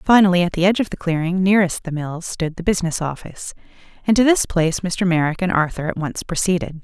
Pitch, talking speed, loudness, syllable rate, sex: 175 Hz, 220 wpm, -19 LUFS, 6.5 syllables/s, female